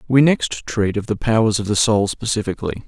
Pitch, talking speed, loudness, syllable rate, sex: 110 Hz, 210 wpm, -19 LUFS, 5.6 syllables/s, male